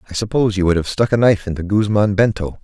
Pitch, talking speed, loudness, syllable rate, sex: 100 Hz, 250 wpm, -17 LUFS, 7.1 syllables/s, male